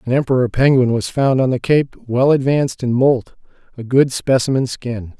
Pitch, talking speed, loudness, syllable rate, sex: 125 Hz, 185 wpm, -16 LUFS, 5.0 syllables/s, male